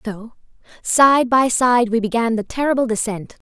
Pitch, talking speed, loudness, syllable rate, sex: 235 Hz, 155 wpm, -17 LUFS, 4.6 syllables/s, female